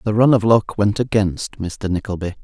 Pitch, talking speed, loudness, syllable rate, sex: 105 Hz, 195 wpm, -18 LUFS, 4.9 syllables/s, male